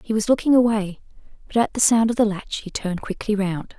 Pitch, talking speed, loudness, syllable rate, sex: 215 Hz, 240 wpm, -21 LUFS, 5.9 syllables/s, female